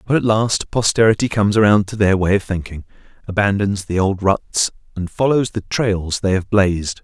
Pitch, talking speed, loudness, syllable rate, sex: 100 Hz, 190 wpm, -17 LUFS, 5.1 syllables/s, male